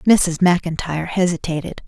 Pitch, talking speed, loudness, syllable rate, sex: 170 Hz, 95 wpm, -19 LUFS, 5.0 syllables/s, female